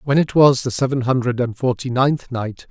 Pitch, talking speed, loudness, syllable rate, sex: 130 Hz, 220 wpm, -18 LUFS, 5.0 syllables/s, male